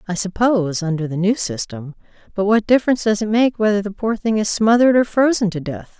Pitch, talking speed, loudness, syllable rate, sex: 205 Hz, 220 wpm, -18 LUFS, 6.1 syllables/s, female